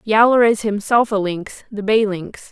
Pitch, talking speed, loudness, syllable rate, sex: 215 Hz, 190 wpm, -17 LUFS, 4.2 syllables/s, female